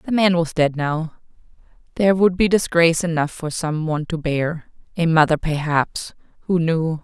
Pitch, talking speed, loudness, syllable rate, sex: 165 Hz, 155 wpm, -19 LUFS, 4.8 syllables/s, female